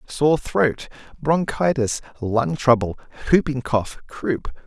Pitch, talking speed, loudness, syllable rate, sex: 135 Hz, 105 wpm, -21 LUFS, 3.5 syllables/s, male